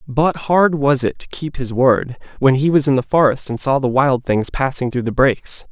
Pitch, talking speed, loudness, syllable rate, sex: 135 Hz, 240 wpm, -17 LUFS, 4.9 syllables/s, male